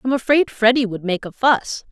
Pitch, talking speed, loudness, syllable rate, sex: 235 Hz, 220 wpm, -18 LUFS, 5.0 syllables/s, female